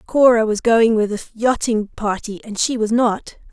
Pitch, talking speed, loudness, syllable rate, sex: 225 Hz, 190 wpm, -18 LUFS, 4.5 syllables/s, female